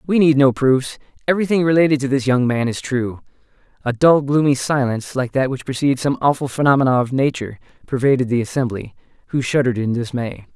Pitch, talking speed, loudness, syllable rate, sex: 130 Hz, 180 wpm, -18 LUFS, 6.3 syllables/s, male